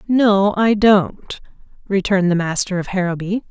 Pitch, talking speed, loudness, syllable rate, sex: 195 Hz, 135 wpm, -17 LUFS, 4.6 syllables/s, female